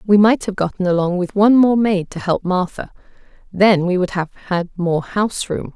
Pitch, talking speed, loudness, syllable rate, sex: 190 Hz, 210 wpm, -17 LUFS, 5.3 syllables/s, female